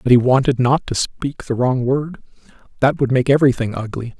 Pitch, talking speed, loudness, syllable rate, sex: 130 Hz, 200 wpm, -17 LUFS, 5.4 syllables/s, male